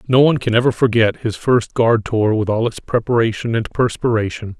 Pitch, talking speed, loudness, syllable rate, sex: 115 Hz, 195 wpm, -17 LUFS, 5.4 syllables/s, male